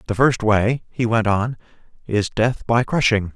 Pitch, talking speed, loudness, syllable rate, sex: 110 Hz, 180 wpm, -19 LUFS, 4.2 syllables/s, male